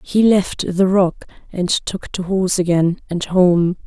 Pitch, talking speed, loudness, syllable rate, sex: 185 Hz, 170 wpm, -17 LUFS, 4.0 syllables/s, female